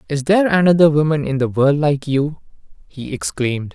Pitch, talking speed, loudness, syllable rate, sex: 150 Hz, 175 wpm, -16 LUFS, 5.4 syllables/s, male